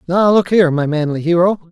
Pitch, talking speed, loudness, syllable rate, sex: 175 Hz, 210 wpm, -14 LUFS, 5.8 syllables/s, male